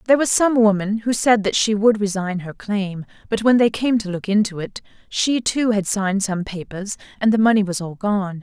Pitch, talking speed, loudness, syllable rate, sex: 205 Hz, 230 wpm, -19 LUFS, 5.2 syllables/s, female